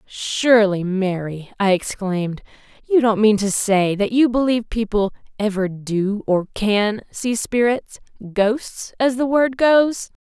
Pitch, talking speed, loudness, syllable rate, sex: 215 Hz, 135 wpm, -19 LUFS, 4.0 syllables/s, female